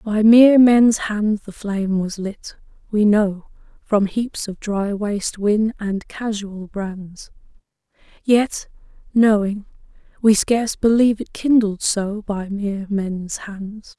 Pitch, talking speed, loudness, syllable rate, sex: 210 Hz, 135 wpm, -19 LUFS, 3.6 syllables/s, female